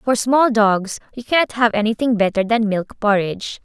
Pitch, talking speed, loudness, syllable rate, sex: 220 Hz, 180 wpm, -17 LUFS, 5.1 syllables/s, female